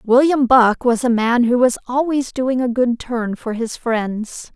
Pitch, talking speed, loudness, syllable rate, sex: 245 Hz, 200 wpm, -17 LUFS, 3.9 syllables/s, female